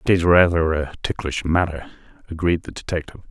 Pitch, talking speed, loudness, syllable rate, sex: 80 Hz, 165 wpm, -20 LUFS, 6.2 syllables/s, male